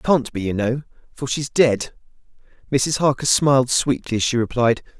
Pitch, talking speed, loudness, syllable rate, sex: 130 Hz, 180 wpm, -20 LUFS, 5.2 syllables/s, male